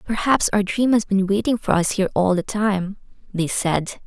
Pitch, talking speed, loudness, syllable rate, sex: 200 Hz, 205 wpm, -20 LUFS, 5.0 syllables/s, female